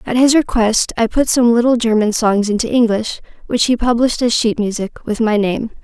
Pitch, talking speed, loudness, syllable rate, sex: 230 Hz, 205 wpm, -15 LUFS, 5.4 syllables/s, female